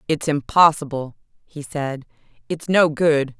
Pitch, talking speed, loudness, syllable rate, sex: 145 Hz, 125 wpm, -20 LUFS, 4.0 syllables/s, female